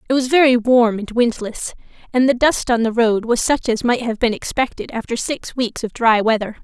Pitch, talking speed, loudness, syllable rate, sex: 235 Hz, 225 wpm, -17 LUFS, 5.1 syllables/s, female